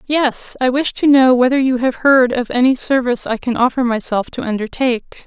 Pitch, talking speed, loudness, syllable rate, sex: 250 Hz, 205 wpm, -15 LUFS, 5.5 syllables/s, female